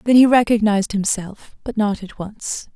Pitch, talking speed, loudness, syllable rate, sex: 215 Hz, 175 wpm, -18 LUFS, 4.6 syllables/s, female